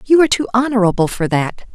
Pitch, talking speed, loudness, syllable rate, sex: 225 Hz, 205 wpm, -16 LUFS, 6.5 syllables/s, female